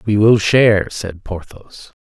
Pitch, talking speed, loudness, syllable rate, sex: 100 Hz, 150 wpm, -14 LUFS, 3.8 syllables/s, male